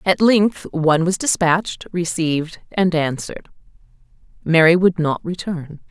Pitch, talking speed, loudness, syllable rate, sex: 170 Hz, 120 wpm, -18 LUFS, 4.6 syllables/s, female